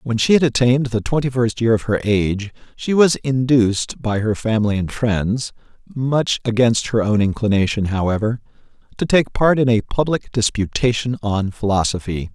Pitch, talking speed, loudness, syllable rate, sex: 115 Hz, 155 wpm, -18 LUFS, 5.1 syllables/s, male